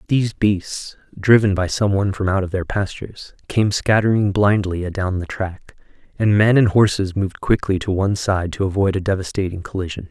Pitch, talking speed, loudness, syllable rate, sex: 95 Hz, 180 wpm, -19 LUFS, 5.4 syllables/s, male